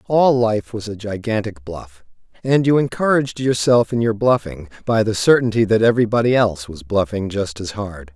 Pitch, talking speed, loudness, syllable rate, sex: 110 Hz, 175 wpm, -18 LUFS, 5.2 syllables/s, male